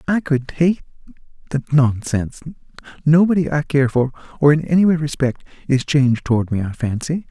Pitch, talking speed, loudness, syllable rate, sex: 140 Hz, 150 wpm, -18 LUFS, 5.7 syllables/s, male